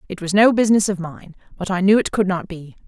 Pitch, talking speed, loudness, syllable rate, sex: 190 Hz, 270 wpm, -18 LUFS, 6.3 syllables/s, female